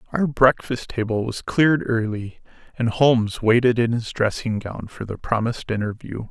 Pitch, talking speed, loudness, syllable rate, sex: 115 Hz, 160 wpm, -21 LUFS, 4.9 syllables/s, male